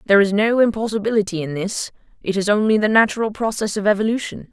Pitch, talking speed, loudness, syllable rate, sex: 210 Hz, 185 wpm, -19 LUFS, 6.6 syllables/s, female